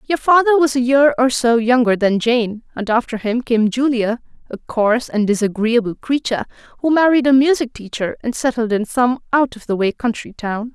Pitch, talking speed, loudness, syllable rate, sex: 240 Hz, 195 wpm, -17 LUFS, 5.3 syllables/s, female